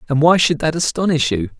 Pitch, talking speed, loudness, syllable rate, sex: 155 Hz, 225 wpm, -16 LUFS, 5.9 syllables/s, male